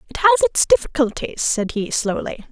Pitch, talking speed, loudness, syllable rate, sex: 285 Hz, 165 wpm, -19 LUFS, 5.4 syllables/s, female